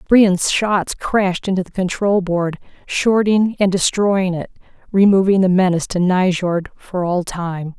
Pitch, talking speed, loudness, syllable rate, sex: 185 Hz, 145 wpm, -17 LUFS, 4.3 syllables/s, female